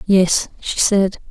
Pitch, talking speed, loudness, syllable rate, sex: 190 Hz, 140 wpm, -17 LUFS, 2.9 syllables/s, female